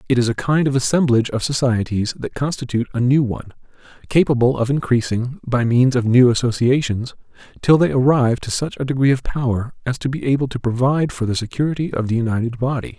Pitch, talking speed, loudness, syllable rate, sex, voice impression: 125 Hz, 200 wpm, -18 LUFS, 6.2 syllables/s, male, very masculine, very adult-like, middle-aged, very thick, slightly relaxed, slightly weak, slightly bright, soft, slightly muffled, fluent, slightly raspy, cool, very intellectual, slightly refreshing, very sincere, very calm, friendly, very reassuring, unique, very elegant, slightly wild, very sweet, slightly lively, very kind, slightly modest